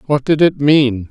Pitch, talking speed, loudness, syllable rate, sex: 140 Hz, 215 wpm, -13 LUFS, 4.2 syllables/s, male